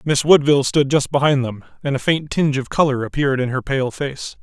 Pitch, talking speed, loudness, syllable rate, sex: 140 Hz, 230 wpm, -18 LUFS, 5.9 syllables/s, male